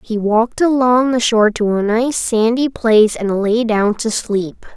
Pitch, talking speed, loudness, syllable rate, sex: 225 Hz, 190 wpm, -15 LUFS, 4.4 syllables/s, female